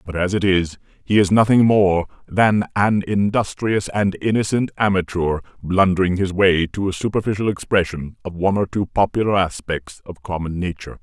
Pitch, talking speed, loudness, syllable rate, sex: 95 Hz, 165 wpm, -19 LUFS, 5.1 syllables/s, male